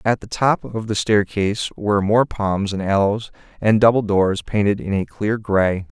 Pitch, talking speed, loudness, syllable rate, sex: 105 Hz, 190 wpm, -19 LUFS, 4.6 syllables/s, male